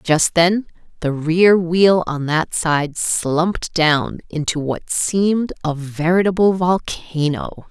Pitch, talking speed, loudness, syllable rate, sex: 170 Hz, 125 wpm, -18 LUFS, 3.4 syllables/s, female